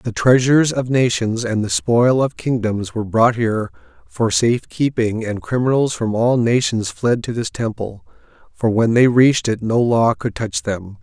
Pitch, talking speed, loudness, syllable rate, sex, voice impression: 115 Hz, 185 wpm, -17 LUFS, 4.6 syllables/s, male, masculine, middle-aged, tensed, slightly powerful, slightly dark, slightly hard, cool, sincere, calm, mature, reassuring, wild, kind, slightly modest